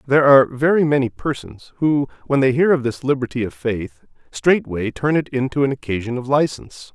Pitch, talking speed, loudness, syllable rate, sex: 135 Hz, 190 wpm, -19 LUFS, 5.6 syllables/s, male